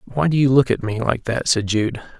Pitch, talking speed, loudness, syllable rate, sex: 125 Hz, 275 wpm, -19 LUFS, 5.2 syllables/s, male